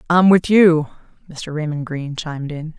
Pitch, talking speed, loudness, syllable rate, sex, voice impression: 160 Hz, 170 wpm, -17 LUFS, 5.1 syllables/s, female, feminine, adult-like, tensed, slightly powerful, slightly hard, clear, fluent, intellectual, calm, elegant, slightly lively, slightly strict, sharp